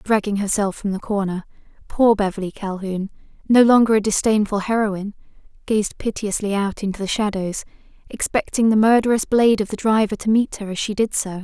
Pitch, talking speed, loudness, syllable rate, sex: 210 Hz, 175 wpm, -20 LUFS, 5.6 syllables/s, female